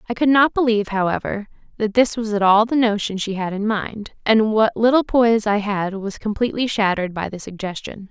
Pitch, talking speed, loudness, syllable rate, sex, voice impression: 215 Hz, 205 wpm, -19 LUFS, 5.6 syllables/s, female, very feminine, young, thin, tensed, slightly powerful, bright, soft, very clear, slightly fluent, slightly raspy, very cute, intellectual, very refreshing, sincere, calm, very friendly, very reassuring, very unique, elegant, slightly wild, very sweet, lively, kind, slightly sharp, slightly modest